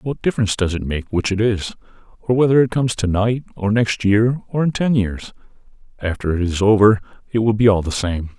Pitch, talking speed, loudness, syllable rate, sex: 105 Hz, 215 wpm, -18 LUFS, 5.6 syllables/s, male